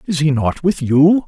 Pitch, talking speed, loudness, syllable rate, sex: 155 Hz, 235 wpm, -15 LUFS, 4.4 syllables/s, male